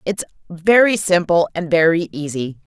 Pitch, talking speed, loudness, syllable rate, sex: 175 Hz, 130 wpm, -17 LUFS, 4.6 syllables/s, female